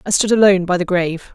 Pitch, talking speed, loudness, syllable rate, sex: 185 Hz, 265 wpm, -15 LUFS, 7.3 syllables/s, female